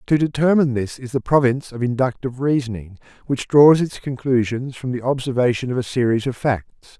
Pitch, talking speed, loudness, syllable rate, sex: 130 Hz, 180 wpm, -19 LUFS, 5.6 syllables/s, male